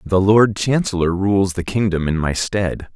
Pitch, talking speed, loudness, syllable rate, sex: 95 Hz, 185 wpm, -18 LUFS, 4.2 syllables/s, male